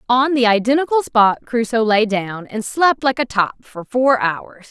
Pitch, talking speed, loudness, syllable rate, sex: 235 Hz, 190 wpm, -17 LUFS, 4.3 syllables/s, female